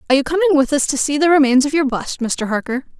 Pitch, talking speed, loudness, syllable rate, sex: 280 Hz, 280 wpm, -16 LUFS, 6.9 syllables/s, female